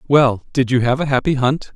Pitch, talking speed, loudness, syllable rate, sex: 130 Hz, 240 wpm, -17 LUFS, 5.3 syllables/s, male